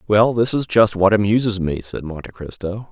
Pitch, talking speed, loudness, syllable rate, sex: 100 Hz, 205 wpm, -18 LUFS, 5.1 syllables/s, male